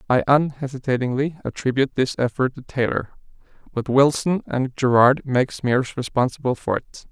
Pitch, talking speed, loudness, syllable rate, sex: 130 Hz, 135 wpm, -21 LUFS, 5.3 syllables/s, male